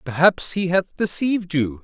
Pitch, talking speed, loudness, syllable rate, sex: 170 Hz, 165 wpm, -20 LUFS, 4.6 syllables/s, male